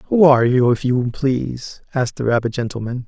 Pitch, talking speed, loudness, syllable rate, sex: 125 Hz, 195 wpm, -18 LUFS, 6.0 syllables/s, male